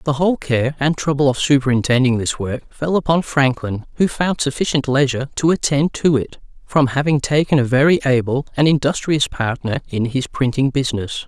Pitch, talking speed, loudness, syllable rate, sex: 135 Hz, 175 wpm, -18 LUFS, 5.4 syllables/s, male